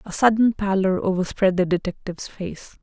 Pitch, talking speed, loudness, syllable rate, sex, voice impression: 190 Hz, 150 wpm, -22 LUFS, 5.4 syllables/s, female, feminine, middle-aged, tensed, powerful, bright, clear, halting, friendly, reassuring, elegant, lively, slightly kind